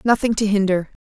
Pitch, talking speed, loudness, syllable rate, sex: 205 Hz, 175 wpm, -19 LUFS, 6.0 syllables/s, female